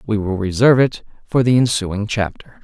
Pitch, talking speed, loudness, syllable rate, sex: 110 Hz, 180 wpm, -17 LUFS, 5.2 syllables/s, male